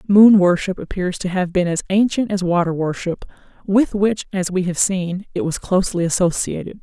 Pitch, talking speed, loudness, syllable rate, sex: 185 Hz, 185 wpm, -18 LUFS, 5.1 syllables/s, female